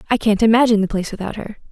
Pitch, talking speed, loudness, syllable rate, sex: 215 Hz, 245 wpm, -17 LUFS, 8.5 syllables/s, female